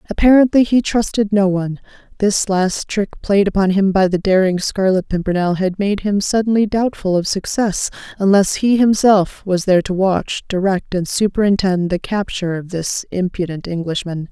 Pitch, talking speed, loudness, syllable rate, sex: 195 Hz, 165 wpm, -16 LUFS, 5.0 syllables/s, female